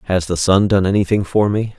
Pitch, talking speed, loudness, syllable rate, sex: 100 Hz, 235 wpm, -16 LUFS, 5.7 syllables/s, male